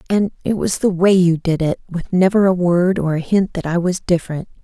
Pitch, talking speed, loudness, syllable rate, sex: 180 Hz, 245 wpm, -17 LUFS, 5.4 syllables/s, female